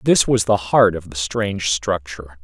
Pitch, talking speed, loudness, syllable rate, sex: 90 Hz, 195 wpm, -18 LUFS, 4.8 syllables/s, male